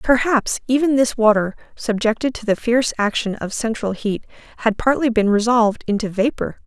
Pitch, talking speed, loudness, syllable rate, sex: 230 Hz, 160 wpm, -19 LUFS, 5.4 syllables/s, female